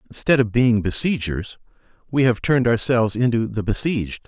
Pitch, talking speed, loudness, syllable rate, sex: 115 Hz, 155 wpm, -20 LUFS, 5.7 syllables/s, male